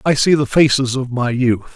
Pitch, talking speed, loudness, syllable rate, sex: 130 Hz, 240 wpm, -15 LUFS, 5.3 syllables/s, male